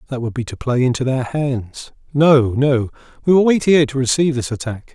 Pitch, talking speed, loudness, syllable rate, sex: 135 Hz, 220 wpm, -17 LUFS, 5.5 syllables/s, male